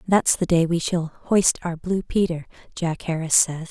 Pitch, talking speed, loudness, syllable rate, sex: 170 Hz, 195 wpm, -22 LUFS, 4.3 syllables/s, female